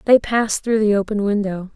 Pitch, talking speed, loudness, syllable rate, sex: 210 Hz, 205 wpm, -18 LUFS, 5.7 syllables/s, female